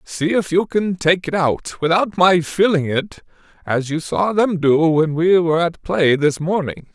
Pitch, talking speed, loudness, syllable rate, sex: 170 Hz, 200 wpm, -17 LUFS, 4.3 syllables/s, male